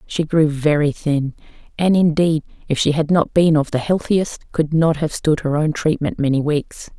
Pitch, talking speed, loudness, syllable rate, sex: 155 Hz, 205 wpm, -18 LUFS, 4.7 syllables/s, female